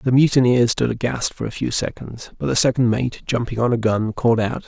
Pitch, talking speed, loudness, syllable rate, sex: 120 Hz, 230 wpm, -19 LUFS, 5.6 syllables/s, male